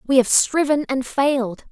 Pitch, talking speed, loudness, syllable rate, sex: 265 Hz, 175 wpm, -19 LUFS, 4.6 syllables/s, female